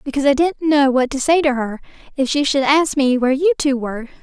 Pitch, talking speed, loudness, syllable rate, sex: 275 Hz, 255 wpm, -17 LUFS, 6.2 syllables/s, female